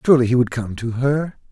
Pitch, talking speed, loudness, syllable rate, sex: 130 Hz, 240 wpm, -19 LUFS, 6.2 syllables/s, male